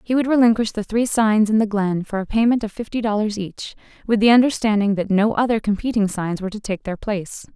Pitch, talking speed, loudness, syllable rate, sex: 215 Hz, 230 wpm, -19 LUFS, 5.9 syllables/s, female